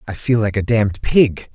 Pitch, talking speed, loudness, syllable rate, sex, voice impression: 110 Hz, 235 wpm, -17 LUFS, 5.0 syllables/s, male, very masculine, very adult-like, very middle-aged, very thick, tensed, very powerful, dark, slightly soft, muffled, fluent, slightly raspy, cool, intellectual, sincere, very calm, very mature, friendly, very reassuring, very wild, slightly lively, slightly strict, slightly intense